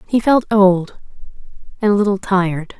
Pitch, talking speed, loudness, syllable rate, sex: 200 Hz, 150 wpm, -16 LUFS, 5.1 syllables/s, female